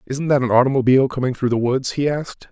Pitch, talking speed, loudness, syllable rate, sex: 130 Hz, 240 wpm, -18 LUFS, 7.0 syllables/s, male